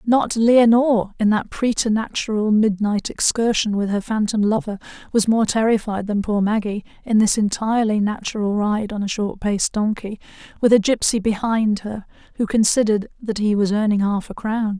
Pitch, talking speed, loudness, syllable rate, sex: 215 Hz, 165 wpm, -19 LUFS, 5.1 syllables/s, female